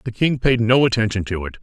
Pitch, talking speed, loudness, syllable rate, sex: 115 Hz, 260 wpm, -18 LUFS, 6.1 syllables/s, male